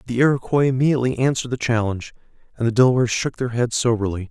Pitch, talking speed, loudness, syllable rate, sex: 120 Hz, 180 wpm, -20 LUFS, 7.6 syllables/s, male